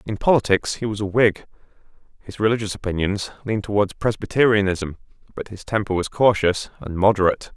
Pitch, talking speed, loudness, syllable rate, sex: 105 Hz, 150 wpm, -21 LUFS, 5.9 syllables/s, male